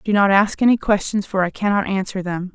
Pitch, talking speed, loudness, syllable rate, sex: 195 Hz, 235 wpm, -19 LUFS, 5.7 syllables/s, female